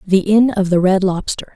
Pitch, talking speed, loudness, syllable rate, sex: 195 Hz, 230 wpm, -15 LUFS, 4.9 syllables/s, female